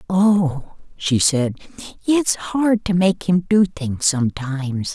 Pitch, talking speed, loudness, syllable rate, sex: 170 Hz, 135 wpm, -19 LUFS, 3.5 syllables/s, male